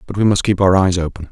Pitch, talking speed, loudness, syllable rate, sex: 95 Hz, 320 wpm, -15 LUFS, 6.8 syllables/s, male